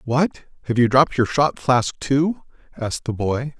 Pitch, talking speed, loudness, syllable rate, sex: 130 Hz, 185 wpm, -20 LUFS, 4.4 syllables/s, male